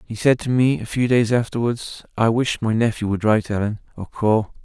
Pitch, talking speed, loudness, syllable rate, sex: 115 Hz, 220 wpm, -20 LUFS, 5.2 syllables/s, male